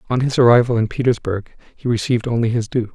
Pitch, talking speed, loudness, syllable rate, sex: 120 Hz, 205 wpm, -18 LUFS, 6.7 syllables/s, male